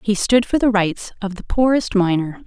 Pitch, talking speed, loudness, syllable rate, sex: 210 Hz, 220 wpm, -18 LUFS, 4.9 syllables/s, female